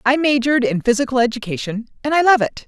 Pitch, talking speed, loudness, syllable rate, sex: 250 Hz, 200 wpm, -17 LUFS, 6.6 syllables/s, female